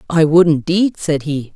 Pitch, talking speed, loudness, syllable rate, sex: 160 Hz, 195 wpm, -15 LUFS, 4.4 syllables/s, female